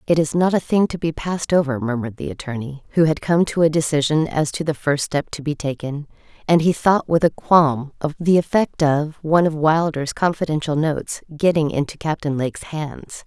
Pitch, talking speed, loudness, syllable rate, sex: 155 Hz, 210 wpm, -20 LUFS, 5.4 syllables/s, female